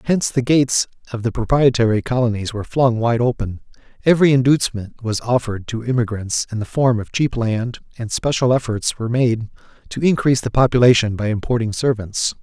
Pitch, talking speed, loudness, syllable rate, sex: 120 Hz, 170 wpm, -18 LUFS, 5.9 syllables/s, male